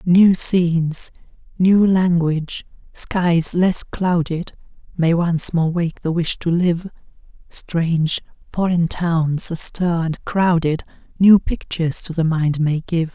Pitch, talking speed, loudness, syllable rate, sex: 170 Hz, 130 wpm, -18 LUFS, 3.6 syllables/s, female